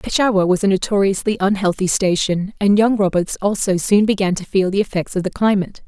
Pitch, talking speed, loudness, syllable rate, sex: 195 Hz, 195 wpm, -17 LUFS, 5.8 syllables/s, female